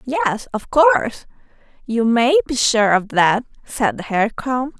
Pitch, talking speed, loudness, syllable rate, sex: 245 Hz, 165 wpm, -17 LUFS, 3.7 syllables/s, female